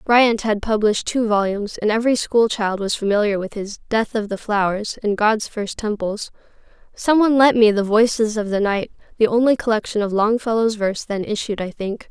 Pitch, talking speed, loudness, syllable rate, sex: 215 Hz, 200 wpm, -19 LUFS, 5.4 syllables/s, female